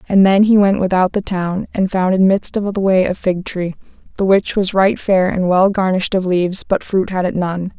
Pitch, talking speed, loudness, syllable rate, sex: 190 Hz, 245 wpm, -16 LUFS, 5.1 syllables/s, female